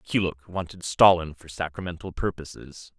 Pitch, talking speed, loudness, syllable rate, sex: 90 Hz, 120 wpm, -25 LUFS, 5.1 syllables/s, male